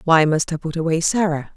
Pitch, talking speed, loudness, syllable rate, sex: 165 Hz, 230 wpm, -19 LUFS, 5.6 syllables/s, female